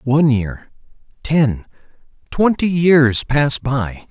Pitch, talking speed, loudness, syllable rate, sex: 135 Hz, 100 wpm, -16 LUFS, 3.1 syllables/s, male